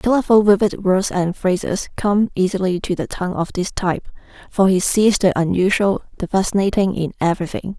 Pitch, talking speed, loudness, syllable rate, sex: 190 Hz, 170 wpm, -18 LUFS, 5.5 syllables/s, female